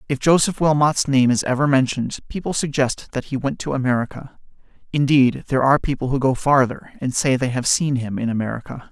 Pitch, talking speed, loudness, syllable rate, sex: 135 Hz, 195 wpm, -20 LUFS, 5.9 syllables/s, male